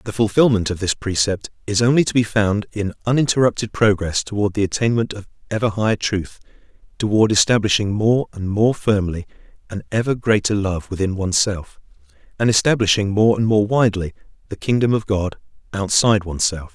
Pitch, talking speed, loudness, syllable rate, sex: 105 Hz, 160 wpm, -19 LUFS, 5.7 syllables/s, male